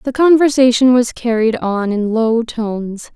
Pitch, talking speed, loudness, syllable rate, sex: 235 Hz, 150 wpm, -14 LUFS, 4.3 syllables/s, female